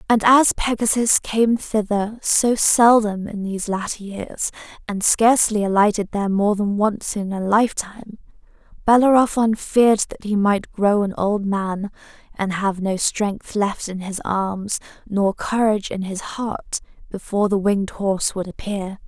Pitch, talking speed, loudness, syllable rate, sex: 210 Hz, 155 wpm, -20 LUFS, 4.4 syllables/s, female